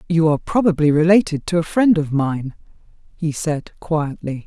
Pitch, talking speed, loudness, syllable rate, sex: 160 Hz, 160 wpm, -18 LUFS, 5.0 syllables/s, female